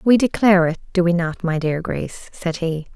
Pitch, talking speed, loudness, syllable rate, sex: 180 Hz, 225 wpm, -19 LUFS, 5.4 syllables/s, female